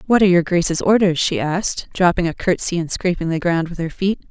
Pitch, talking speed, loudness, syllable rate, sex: 175 Hz, 235 wpm, -18 LUFS, 6.0 syllables/s, female